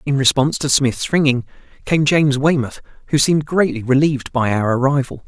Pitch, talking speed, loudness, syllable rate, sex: 140 Hz, 170 wpm, -17 LUFS, 5.8 syllables/s, male